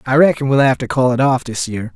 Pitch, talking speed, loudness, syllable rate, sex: 125 Hz, 305 wpm, -15 LUFS, 6.0 syllables/s, male